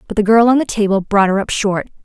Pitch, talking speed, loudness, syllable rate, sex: 210 Hz, 295 wpm, -14 LUFS, 6.2 syllables/s, female